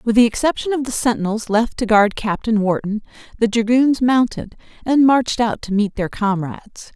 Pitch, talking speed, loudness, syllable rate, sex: 225 Hz, 180 wpm, -18 LUFS, 5.2 syllables/s, female